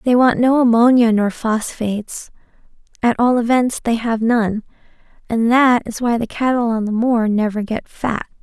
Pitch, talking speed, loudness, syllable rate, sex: 235 Hz, 165 wpm, -17 LUFS, 4.6 syllables/s, female